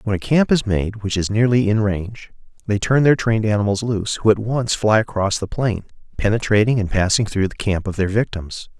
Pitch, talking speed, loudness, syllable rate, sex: 105 Hz, 220 wpm, -19 LUFS, 5.6 syllables/s, male